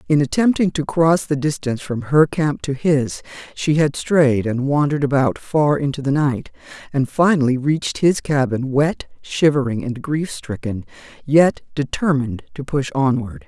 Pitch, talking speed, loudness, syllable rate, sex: 145 Hz, 160 wpm, -19 LUFS, 4.6 syllables/s, female